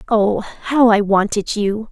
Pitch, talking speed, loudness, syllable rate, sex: 210 Hz, 155 wpm, -16 LUFS, 3.5 syllables/s, female